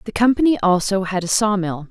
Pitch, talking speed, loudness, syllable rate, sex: 200 Hz, 220 wpm, -18 LUFS, 5.7 syllables/s, female